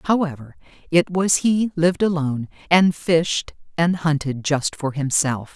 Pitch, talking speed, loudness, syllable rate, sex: 160 Hz, 140 wpm, -20 LUFS, 4.2 syllables/s, female